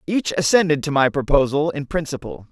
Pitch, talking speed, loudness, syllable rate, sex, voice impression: 150 Hz, 165 wpm, -19 LUFS, 5.6 syllables/s, male, masculine, adult-like, slightly bright, clear, slightly refreshing, slightly friendly, slightly unique, slightly lively